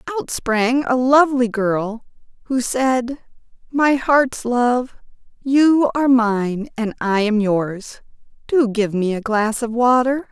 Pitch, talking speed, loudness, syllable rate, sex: 240 Hz, 140 wpm, -18 LUFS, 3.5 syllables/s, female